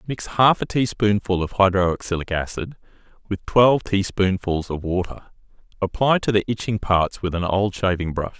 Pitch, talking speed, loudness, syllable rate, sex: 100 Hz, 155 wpm, -21 LUFS, 5.0 syllables/s, male